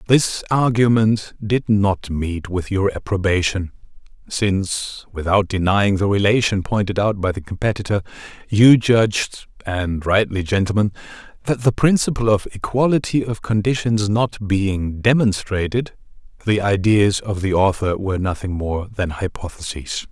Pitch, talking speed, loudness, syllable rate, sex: 100 Hz, 130 wpm, -19 LUFS, 4.5 syllables/s, male